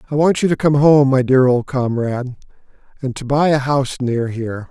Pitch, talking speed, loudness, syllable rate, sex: 135 Hz, 215 wpm, -16 LUFS, 5.5 syllables/s, male